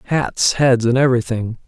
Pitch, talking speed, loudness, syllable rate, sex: 125 Hz, 145 wpm, -16 LUFS, 5.0 syllables/s, male